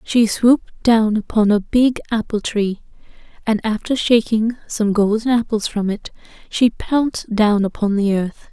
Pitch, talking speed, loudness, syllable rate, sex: 220 Hz, 155 wpm, -18 LUFS, 4.4 syllables/s, female